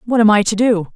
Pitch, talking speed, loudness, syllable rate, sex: 220 Hz, 315 wpm, -14 LUFS, 6.0 syllables/s, female